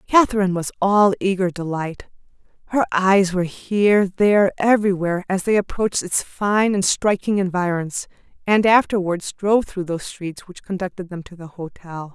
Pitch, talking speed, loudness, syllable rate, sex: 190 Hz, 150 wpm, -19 LUFS, 5.2 syllables/s, female